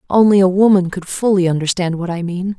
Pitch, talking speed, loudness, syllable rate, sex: 185 Hz, 210 wpm, -15 LUFS, 5.9 syllables/s, female